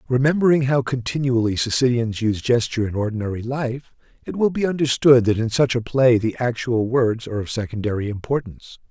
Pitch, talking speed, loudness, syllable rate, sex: 120 Hz, 170 wpm, -20 LUFS, 6.0 syllables/s, male